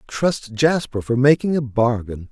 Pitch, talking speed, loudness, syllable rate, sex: 130 Hz, 155 wpm, -19 LUFS, 4.2 syllables/s, male